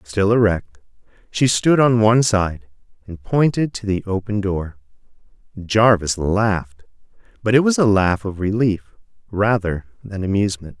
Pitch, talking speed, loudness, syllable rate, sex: 105 Hz, 140 wpm, -18 LUFS, 4.6 syllables/s, male